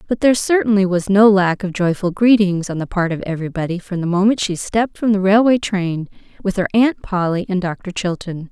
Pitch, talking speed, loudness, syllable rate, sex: 195 Hz, 210 wpm, -17 LUFS, 5.6 syllables/s, female